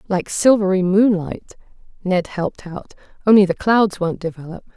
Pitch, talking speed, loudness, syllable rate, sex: 190 Hz, 140 wpm, -17 LUFS, 5.0 syllables/s, female